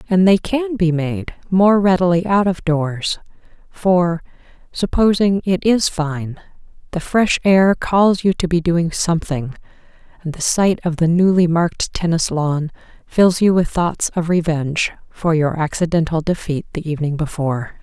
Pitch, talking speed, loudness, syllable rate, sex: 175 Hz, 150 wpm, -17 LUFS, 4.4 syllables/s, female